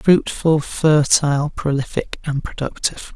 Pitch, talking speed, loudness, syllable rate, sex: 150 Hz, 95 wpm, -19 LUFS, 4.2 syllables/s, male